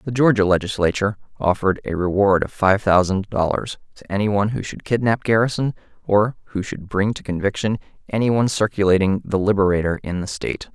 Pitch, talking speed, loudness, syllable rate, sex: 100 Hz, 175 wpm, -20 LUFS, 6.0 syllables/s, male